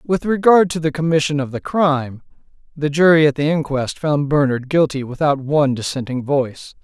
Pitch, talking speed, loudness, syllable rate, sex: 145 Hz, 175 wpm, -17 LUFS, 5.3 syllables/s, male